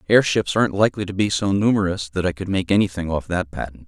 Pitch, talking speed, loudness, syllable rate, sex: 95 Hz, 230 wpm, -21 LUFS, 6.5 syllables/s, male